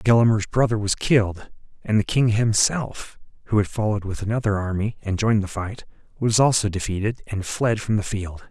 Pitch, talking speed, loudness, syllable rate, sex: 105 Hz, 185 wpm, -22 LUFS, 5.4 syllables/s, male